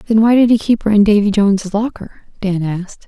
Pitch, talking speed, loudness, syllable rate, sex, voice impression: 210 Hz, 235 wpm, -14 LUFS, 5.8 syllables/s, female, feminine, slightly young, soft, slightly cute, calm, friendly, kind